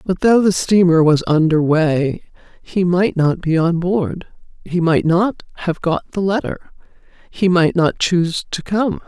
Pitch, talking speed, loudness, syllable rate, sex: 175 Hz, 170 wpm, -16 LUFS, 4.2 syllables/s, female